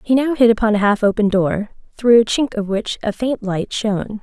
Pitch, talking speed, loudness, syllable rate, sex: 220 Hz, 240 wpm, -17 LUFS, 5.2 syllables/s, female